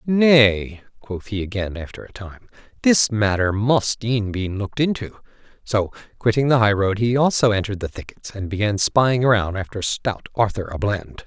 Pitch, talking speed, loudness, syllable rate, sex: 110 Hz, 170 wpm, -20 LUFS, 4.9 syllables/s, male